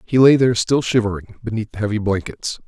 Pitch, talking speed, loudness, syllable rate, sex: 110 Hz, 200 wpm, -18 LUFS, 6.1 syllables/s, male